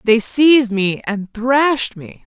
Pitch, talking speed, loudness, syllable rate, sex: 240 Hz, 155 wpm, -15 LUFS, 3.7 syllables/s, female